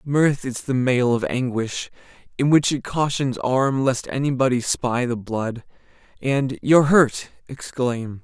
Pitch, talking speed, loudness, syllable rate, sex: 130 Hz, 145 wpm, -21 LUFS, 3.9 syllables/s, male